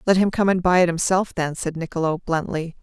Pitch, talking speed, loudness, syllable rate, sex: 175 Hz, 235 wpm, -21 LUFS, 5.8 syllables/s, female